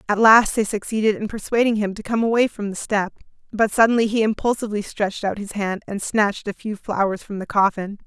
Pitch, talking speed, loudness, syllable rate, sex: 210 Hz, 215 wpm, -21 LUFS, 5.9 syllables/s, female